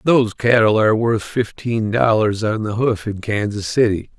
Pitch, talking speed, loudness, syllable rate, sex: 110 Hz, 170 wpm, -18 LUFS, 4.7 syllables/s, male